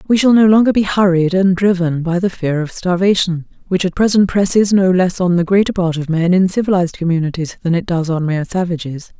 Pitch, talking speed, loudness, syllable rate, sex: 180 Hz, 220 wpm, -15 LUFS, 5.9 syllables/s, female